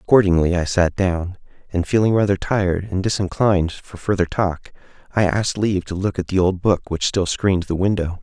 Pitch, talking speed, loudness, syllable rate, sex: 95 Hz, 195 wpm, -20 LUFS, 5.6 syllables/s, male